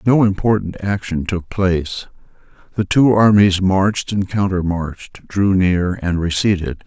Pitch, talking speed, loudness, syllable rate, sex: 95 Hz, 130 wpm, -17 LUFS, 4.3 syllables/s, male